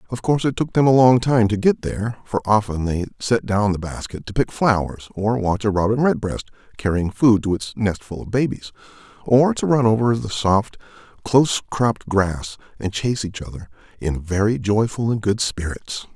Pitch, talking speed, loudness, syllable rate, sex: 105 Hz, 195 wpm, -20 LUFS, 5.1 syllables/s, male